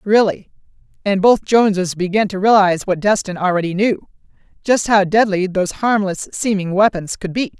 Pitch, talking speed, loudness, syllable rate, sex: 195 Hz, 150 wpm, -16 LUFS, 5.4 syllables/s, female